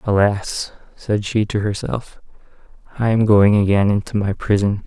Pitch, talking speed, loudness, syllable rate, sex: 105 Hz, 150 wpm, -18 LUFS, 4.5 syllables/s, male